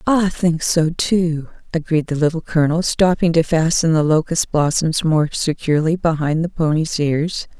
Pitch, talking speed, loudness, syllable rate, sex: 160 Hz, 160 wpm, -18 LUFS, 4.7 syllables/s, female